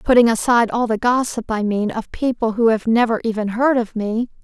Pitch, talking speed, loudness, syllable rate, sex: 230 Hz, 215 wpm, -18 LUFS, 5.5 syllables/s, female